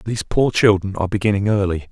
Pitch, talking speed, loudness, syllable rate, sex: 100 Hz, 190 wpm, -18 LUFS, 6.8 syllables/s, male